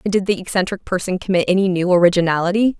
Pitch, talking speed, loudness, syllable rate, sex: 185 Hz, 195 wpm, -17 LUFS, 7.1 syllables/s, female